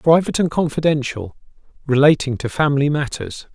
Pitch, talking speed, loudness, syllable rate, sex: 145 Hz, 120 wpm, -18 LUFS, 5.7 syllables/s, male